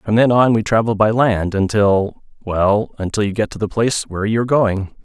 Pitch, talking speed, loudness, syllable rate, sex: 105 Hz, 215 wpm, -17 LUFS, 5.3 syllables/s, male